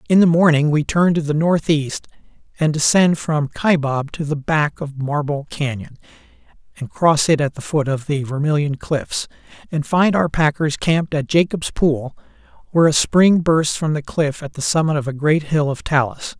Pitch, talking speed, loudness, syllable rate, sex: 150 Hz, 190 wpm, -18 LUFS, 4.8 syllables/s, male